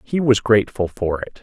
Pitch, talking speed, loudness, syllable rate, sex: 110 Hz, 210 wpm, -19 LUFS, 5.3 syllables/s, male